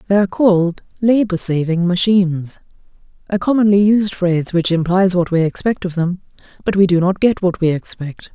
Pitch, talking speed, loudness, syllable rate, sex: 185 Hz, 175 wpm, -16 LUFS, 5.4 syllables/s, female